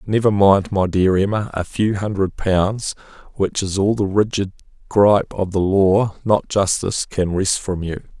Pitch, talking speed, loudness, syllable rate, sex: 100 Hz, 175 wpm, -18 LUFS, 4.4 syllables/s, male